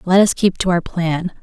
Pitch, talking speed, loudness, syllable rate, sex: 180 Hz, 250 wpm, -17 LUFS, 4.7 syllables/s, female